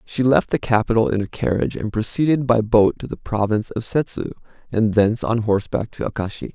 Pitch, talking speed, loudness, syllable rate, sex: 110 Hz, 200 wpm, -20 LUFS, 6.0 syllables/s, male